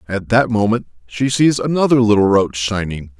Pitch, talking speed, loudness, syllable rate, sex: 110 Hz, 170 wpm, -16 LUFS, 5.0 syllables/s, male